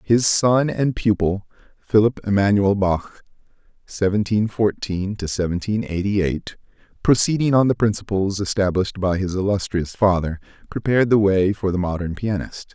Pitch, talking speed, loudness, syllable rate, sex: 100 Hz, 135 wpm, -20 LUFS, 4.0 syllables/s, male